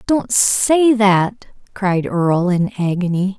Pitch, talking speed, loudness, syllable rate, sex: 200 Hz, 125 wpm, -16 LUFS, 3.4 syllables/s, female